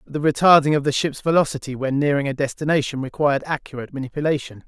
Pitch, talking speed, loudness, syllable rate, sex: 140 Hz, 180 wpm, -20 LUFS, 7.1 syllables/s, male